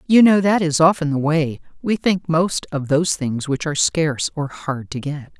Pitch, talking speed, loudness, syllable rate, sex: 155 Hz, 210 wpm, -19 LUFS, 4.9 syllables/s, female